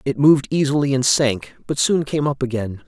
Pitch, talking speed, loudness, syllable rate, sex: 140 Hz, 210 wpm, -19 LUFS, 5.3 syllables/s, male